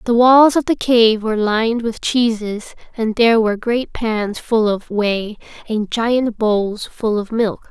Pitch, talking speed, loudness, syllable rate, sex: 225 Hz, 180 wpm, -17 LUFS, 4.0 syllables/s, female